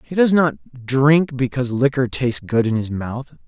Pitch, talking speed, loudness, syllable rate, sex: 130 Hz, 190 wpm, -18 LUFS, 4.6 syllables/s, male